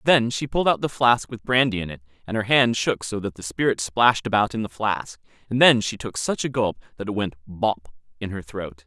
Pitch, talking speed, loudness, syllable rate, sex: 110 Hz, 250 wpm, -22 LUFS, 5.6 syllables/s, male